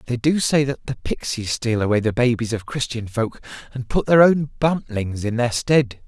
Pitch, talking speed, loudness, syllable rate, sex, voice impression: 125 Hz, 205 wpm, -20 LUFS, 4.7 syllables/s, male, very masculine, very middle-aged, very thick, tensed, slightly powerful, bright, soft, muffled, fluent, slightly raspy, very cool, intellectual, sincere, very calm, very mature, friendly, very reassuring, very unique, slightly elegant, very wild, slightly sweet, lively, kind, slightly intense, slightly modest